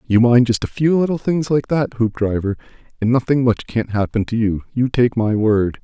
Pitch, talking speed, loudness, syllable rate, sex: 120 Hz, 205 wpm, -18 LUFS, 5.1 syllables/s, male